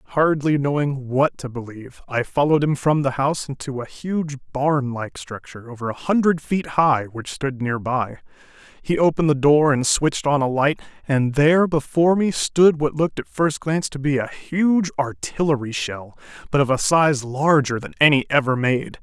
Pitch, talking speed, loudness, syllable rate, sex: 145 Hz, 185 wpm, -20 LUFS, 5.1 syllables/s, male